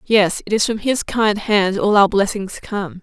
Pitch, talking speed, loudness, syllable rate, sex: 205 Hz, 220 wpm, -17 LUFS, 4.2 syllables/s, female